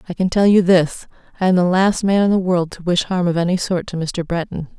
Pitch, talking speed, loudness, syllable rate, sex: 180 Hz, 265 wpm, -17 LUFS, 5.7 syllables/s, female